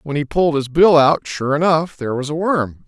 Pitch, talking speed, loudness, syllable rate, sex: 150 Hz, 250 wpm, -17 LUFS, 5.4 syllables/s, male